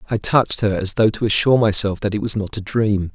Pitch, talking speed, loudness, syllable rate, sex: 105 Hz, 265 wpm, -18 LUFS, 6.1 syllables/s, male